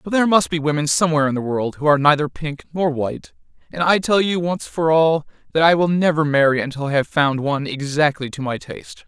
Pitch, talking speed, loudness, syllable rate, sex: 155 Hz, 240 wpm, -19 LUFS, 6.2 syllables/s, male